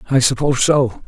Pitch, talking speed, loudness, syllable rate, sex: 130 Hz, 170 wpm, -16 LUFS, 6.0 syllables/s, male